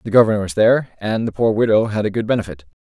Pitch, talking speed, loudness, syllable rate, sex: 110 Hz, 255 wpm, -17 LUFS, 7.3 syllables/s, male